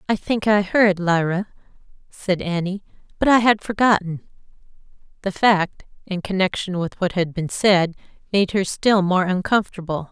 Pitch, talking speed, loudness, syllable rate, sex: 190 Hz, 150 wpm, -20 LUFS, 4.7 syllables/s, female